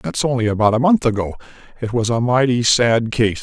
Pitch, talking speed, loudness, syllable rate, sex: 120 Hz, 210 wpm, -17 LUFS, 5.5 syllables/s, male